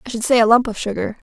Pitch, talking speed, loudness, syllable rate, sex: 230 Hz, 320 wpm, -17 LUFS, 7.1 syllables/s, female